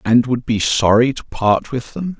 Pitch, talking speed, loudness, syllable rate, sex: 125 Hz, 220 wpm, -17 LUFS, 4.3 syllables/s, male